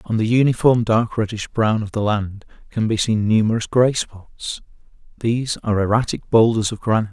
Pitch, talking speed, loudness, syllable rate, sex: 110 Hz, 175 wpm, -19 LUFS, 5.4 syllables/s, male